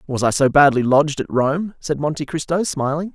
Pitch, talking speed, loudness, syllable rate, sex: 150 Hz, 210 wpm, -18 LUFS, 5.4 syllables/s, male